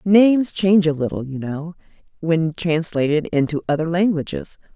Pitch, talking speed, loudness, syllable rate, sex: 165 Hz, 140 wpm, -19 LUFS, 5.0 syllables/s, female